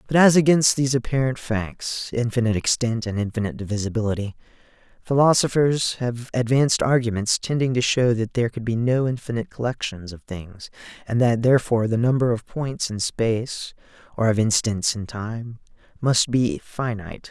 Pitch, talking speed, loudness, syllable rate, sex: 120 Hz, 145 wpm, -22 LUFS, 5.4 syllables/s, male